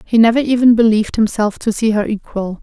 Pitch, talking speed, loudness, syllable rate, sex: 220 Hz, 205 wpm, -14 LUFS, 5.9 syllables/s, female